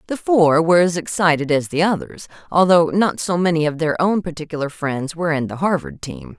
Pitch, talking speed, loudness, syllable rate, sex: 160 Hz, 205 wpm, -18 LUFS, 5.5 syllables/s, female